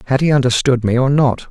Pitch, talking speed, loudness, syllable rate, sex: 130 Hz, 240 wpm, -14 LUFS, 6.2 syllables/s, male